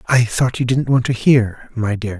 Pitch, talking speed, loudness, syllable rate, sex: 120 Hz, 245 wpm, -17 LUFS, 4.4 syllables/s, male